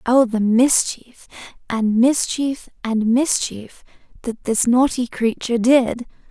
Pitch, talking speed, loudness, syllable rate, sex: 240 Hz, 115 wpm, -18 LUFS, 3.6 syllables/s, female